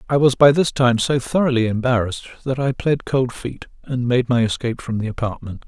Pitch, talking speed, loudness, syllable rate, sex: 125 Hz, 210 wpm, -19 LUFS, 5.7 syllables/s, male